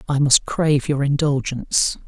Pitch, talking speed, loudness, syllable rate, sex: 140 Hz, 145 wpm, -19 LUFS, 4.9 syllables/s, male